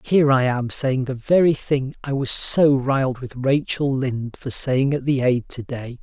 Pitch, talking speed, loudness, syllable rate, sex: 135 Hz, 200 wpm, -20 LUFS, 4.5 syllables/s, male